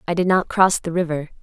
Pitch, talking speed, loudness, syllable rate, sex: 170 Hz, 250 wpm, -19 LUFS, 6.1 syllables/s, female